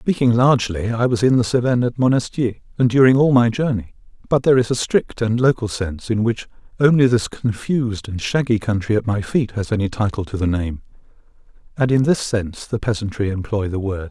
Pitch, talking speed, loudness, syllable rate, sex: 115 Hz, 205 wpm, -19 LUFS, 5.8 syllables/s, male